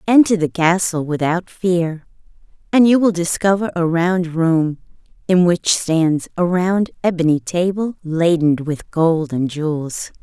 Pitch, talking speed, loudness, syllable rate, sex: 170 Hz, 140 wpm, -17 LUFS, 3.9 syllables/s, female